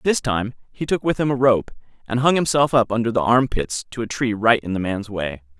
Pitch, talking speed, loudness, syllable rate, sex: 115 Hz, 255 wpm, -20 LUFS, 5.4 syllables/s, male